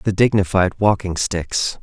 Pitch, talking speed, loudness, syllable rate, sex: 95 Hz, 130 wpm, -18 LUFS, 4.0 syllables/s, male